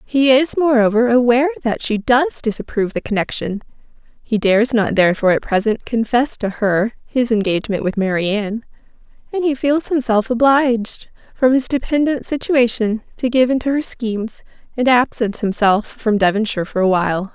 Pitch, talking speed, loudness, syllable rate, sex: 235 Hz, 155 wpm, -17 LUFS, 5.3 syllables/s, female